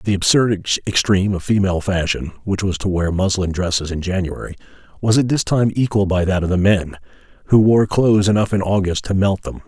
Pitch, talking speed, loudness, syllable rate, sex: 95 Hz, 205 wpm, -17 LUFS, 5.9 syllables/s, male